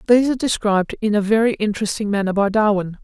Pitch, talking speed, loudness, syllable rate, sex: 210 Hz, 200 wpm, -18 LUFS, 7.2 syllables/s, female